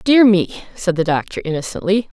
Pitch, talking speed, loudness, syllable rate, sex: 190 Hz, 165 wpm, -17 LUFS, 5.8 syllables/s, female